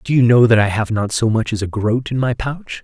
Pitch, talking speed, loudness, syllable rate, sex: 115 Hz, 320 wpm, -16 LUFS, 5.5 syllables/s, male